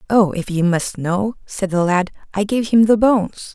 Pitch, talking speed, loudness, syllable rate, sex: 200 Hz, 220 wpm, -18 LUFS, 4.6 syllables/s, female